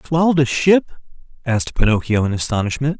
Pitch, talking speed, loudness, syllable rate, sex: 135 Hz, 140 wpm, -17 LUFS, 6.8 syllables/s, male